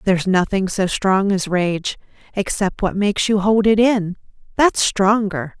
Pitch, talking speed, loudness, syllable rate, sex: 195 Hz, 150 wpm, -18 LUFS, 4.3 syllables/s, female